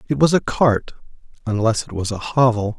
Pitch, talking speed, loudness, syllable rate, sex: 120 Hz, 195 wpm, -19 LUFS, 5.3 syllables/s, male